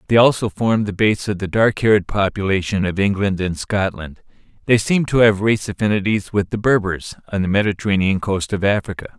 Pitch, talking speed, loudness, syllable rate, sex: 100 Hz, 190 wpm, -18 LUFS, 5.6 syllables/s, male